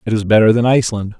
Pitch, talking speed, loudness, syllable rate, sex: 110 Hz, 250 wpm, -13 LUFS, 7.6 syllables/s, male